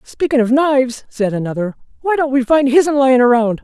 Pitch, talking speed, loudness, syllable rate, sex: 260 Hz, 200 wpm, -15 LUFS, 5.3 syllables/s, female